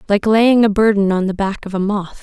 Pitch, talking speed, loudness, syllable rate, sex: 205 Hz, 270 wpm, -15 LUFS, 5.4 syllables/s, female